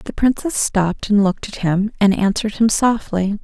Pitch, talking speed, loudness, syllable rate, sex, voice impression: 210 Hz, 190 wpm, -18 LUFS, 5.1 syllables/s, female, feminine, adult-like, tensed, powerful, bright, slightly soft, clear, fluent, slightly raspy, intellectual, calm, slightly friendly, reassuring, elegant, lively, slightly sharp